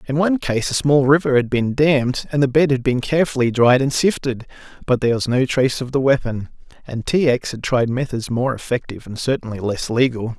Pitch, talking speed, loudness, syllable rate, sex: 130 Hz, 220 wpm, -18 LUFS, 5.8 syllables/s, male